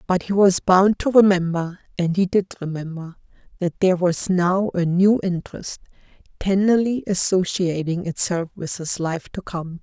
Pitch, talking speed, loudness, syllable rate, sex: 180 Hz, 140 wpm, -20 LUFS, 4.6 syllables/s, female